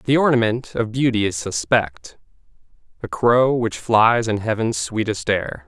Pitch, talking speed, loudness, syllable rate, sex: 110 Hz, 150 wpm, -19 LUFS, 4.2 syllables/s, male